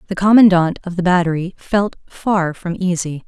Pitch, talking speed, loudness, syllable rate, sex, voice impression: 180 Hz, 165 wpm, -16 LUFS, 4.9 syllables/s, female, very feminine, adult-like, slightly middle-aged, thin, very tensed, powerful, bright, very hard, very clear, very fluent, very cool, very intellectual, very refreshing, very sincere, very calm, very friendly, very reassuring, slightly unique, elegant, sweet, slightly lively, very kind, slightly sharp, slightly modest